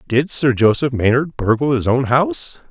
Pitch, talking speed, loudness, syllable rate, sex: 125 Hz, 180 wpm, -17 LUFS, 4.8 syllables/s, male